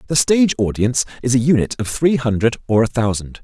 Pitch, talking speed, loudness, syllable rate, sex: 125 Hz, 210 wpm, -17 LUFS, 6.3 syllables/s, male